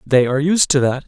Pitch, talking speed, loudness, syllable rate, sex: 145 Hz, 280 wpm, -16 LUFS, 6.2 syllables/s, male